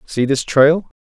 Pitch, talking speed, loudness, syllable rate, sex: 145 Hz, 175 wpm, -15 LUFS, 3.7 syllables/s, male